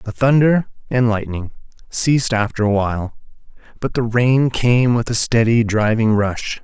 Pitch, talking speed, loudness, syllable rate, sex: 115 Hz, 155 wpm, -17 LUFS, 4.4 syllables/s, male